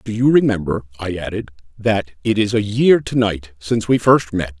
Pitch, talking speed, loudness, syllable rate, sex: 105 Hz, 210 wpm, -18 LUFS, 5.2 syllables/s, male